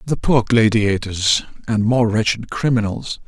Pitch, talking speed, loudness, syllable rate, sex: 110 Hz, 130 wpm, -18 LUFS, 4.3 syllables/s, male